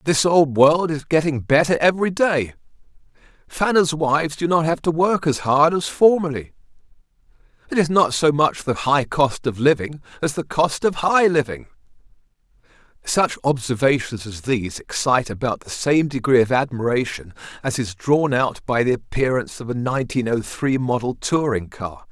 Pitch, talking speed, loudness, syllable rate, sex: 140 Hz, 165 wpm, -20 LUFS, 5.0 syllables/s, male